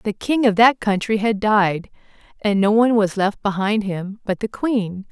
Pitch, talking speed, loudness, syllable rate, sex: 210 Hz, 200 wpm, -19 LUFS, 4.4 syllables/s, female